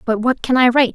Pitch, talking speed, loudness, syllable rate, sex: 245 Hz, 320 wpm, -15 LUFS, 7.2 syllables/s, female